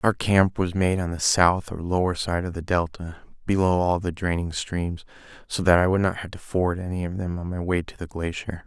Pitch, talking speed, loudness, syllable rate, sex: 90 Hz, 240 wpm, -24 LUFS, 5.2 syllables/s, male